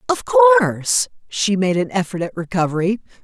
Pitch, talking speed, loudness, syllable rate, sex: 215 Hz, 150 wpm, -17 LUFS, 4.9 syllables/s, female